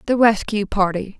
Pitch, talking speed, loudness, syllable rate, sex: 210 Hz, 150 wpm, -19 LUFS, 4.9 syllables/s, female